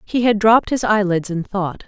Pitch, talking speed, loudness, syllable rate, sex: 205 Hz, 225 wpm, -17 LUFS, 5.2 syllables/s, female